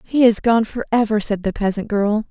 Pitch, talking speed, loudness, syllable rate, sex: 215 Hz, 210 wpm, -18 LUFS, 5.1 syllables/s, female